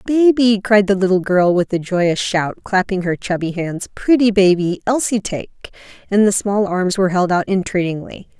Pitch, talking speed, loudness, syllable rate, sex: 195 Hz, 180 wpm, -16 LUFS, 4.9 syllables/s, female